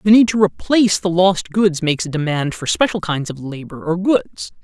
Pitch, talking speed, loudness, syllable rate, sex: 170 Hz, 220 wpm, -17 LUFS, 5.2 syllables/s, male